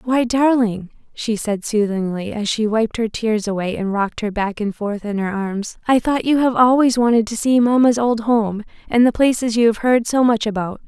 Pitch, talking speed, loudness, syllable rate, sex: 225 Hz, 220 wpm, -18 LUFS, 4.9 syllables/s, female